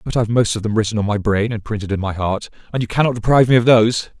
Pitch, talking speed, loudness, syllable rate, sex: 110 Hz, 300 wpm, -17 LUFS, 7.4 syllables/s, male